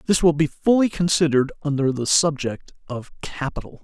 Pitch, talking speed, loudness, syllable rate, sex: 155 Hz, 155 wpm, -21 LUFS, 5.4 syllables/s, male